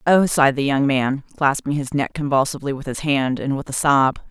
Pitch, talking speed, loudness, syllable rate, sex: 140 Hz, 225 wpm, -20 LUFS, 5.6 syllables/s, female